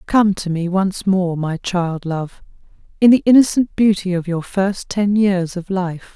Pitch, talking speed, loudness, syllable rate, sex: 190 Hz, 185 wpm, -17 LUFS, 4.1 syllables/s, female